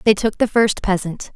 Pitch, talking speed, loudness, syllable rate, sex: 205 Hz, 220 wpm, -18 LUFS, 4.9 syllables/s, female